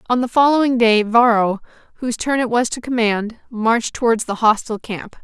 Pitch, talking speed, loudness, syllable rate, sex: 230 Hz, 185 wpm, -17 LUFS, 5.4 syllables/s, female